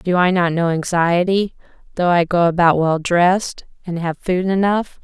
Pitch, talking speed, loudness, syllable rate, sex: 175 Hz, 180 wpm, -17 LUFS, 4.6 syllables/s, female